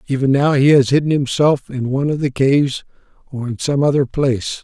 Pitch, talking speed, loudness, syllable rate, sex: 135 Hz, 205 wpm, -16 LUFS, 5.7 syllables/s, male